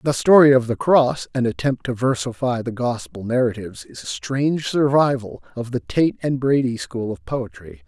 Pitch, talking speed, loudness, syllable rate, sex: 120 Hz, 185 wpm, -20 LUFS, 4.9 syllables/s, male